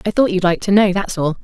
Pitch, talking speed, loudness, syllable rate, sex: 195 Hz, 335 wpm, -16 LUFS, 6.3 syllables/s, female